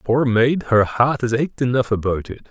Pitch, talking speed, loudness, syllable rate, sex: 120 Hz, 215 wpm, -19 LUFS, 4.9 syllables/s, male